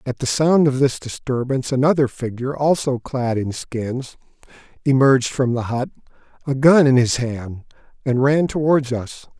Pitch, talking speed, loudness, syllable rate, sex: 130 Hz, 160 wpm, -19 LUFS, 4.8 syllables/s, male